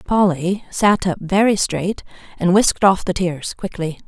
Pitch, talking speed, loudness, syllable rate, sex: 185 Hz, 160 wpm, -18 LUFS, 4.4 syllables/s, female